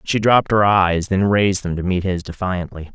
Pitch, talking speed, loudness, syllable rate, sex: 95 Hz, 225 wpm, -18 LUFS, 5.3 syllables/s, male